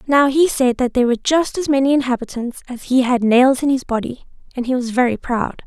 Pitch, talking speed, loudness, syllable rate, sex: 255 Hz, 235 wpm, -17 LUFS, 5.9 syllables/s, female